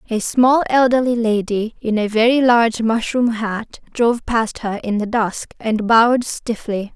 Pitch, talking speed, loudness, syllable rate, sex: 230 Hz, 165 wpm, -17 LUFS, 4.4 syllables/s, female